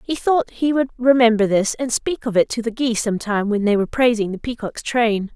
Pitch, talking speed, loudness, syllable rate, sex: 230 Hz, 245 wpm, -19 LUFS, 5.5 syllables/s, female